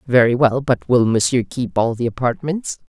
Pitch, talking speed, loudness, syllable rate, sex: 125 Hz, 185 wpm, -18 LUFS, 4.9 syllables/s, female